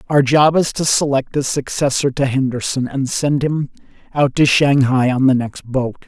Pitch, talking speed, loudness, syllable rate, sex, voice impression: 135 Hz, 190 wpm, -16 LUFS, 4.6 syllables/s, male, masculine, adult-like, tensed, slightly powerful, slightly dark, slightly hard, clear, fluent, cool, very intellectual, slightly refreshing, very sincere, very calm, friendly, reassuring, slightly unique, elegant, slightly wild, slightly sweet, slightly lively, slightly strict